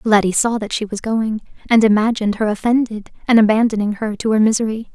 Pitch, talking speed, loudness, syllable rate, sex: 215 Hz, 195 wpm, -17 LUFS, 6.1 syllables/s, female